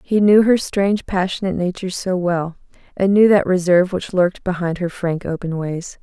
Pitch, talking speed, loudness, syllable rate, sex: 185 Hz, 190 wpm, -18 LUFS, 5.4 syllables/s, female